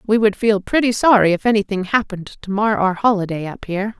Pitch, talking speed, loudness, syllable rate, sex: 205 Hz, 210 wpm, -17 LUFS, 6.0 syllables/s, female